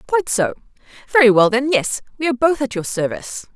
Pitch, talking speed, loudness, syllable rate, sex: 245 Hz, 185 wpm, -17 LUFS, 6.5 syllables/s, female